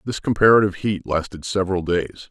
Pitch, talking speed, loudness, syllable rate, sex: 95 Hz, 155 wpm, -20 LUFS, 6.5 syllables/s, male